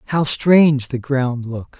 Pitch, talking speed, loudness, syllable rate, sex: 135 Hz, 165 wpm, -17 LUFS, 3.9 syllables/s, male